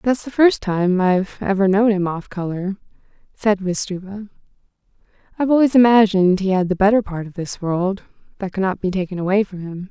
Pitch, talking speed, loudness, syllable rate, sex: 195 Hz, 190 wpm, -18 LUFS, 5.7 syllables/s, female